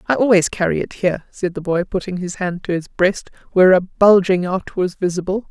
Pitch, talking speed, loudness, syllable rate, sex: 185 Hz, 220 wpm, -18 LUFS, 5.5 syllables/s, female